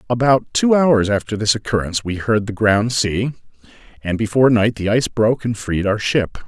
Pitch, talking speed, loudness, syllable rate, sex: 110 Hz, 195 wpm, -17 LUFS, 5.4 syllables/s, male